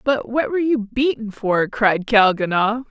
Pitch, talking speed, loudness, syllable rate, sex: 230 Hz, 165 wpm, -19 LUFS, 4.4 syllables/s, female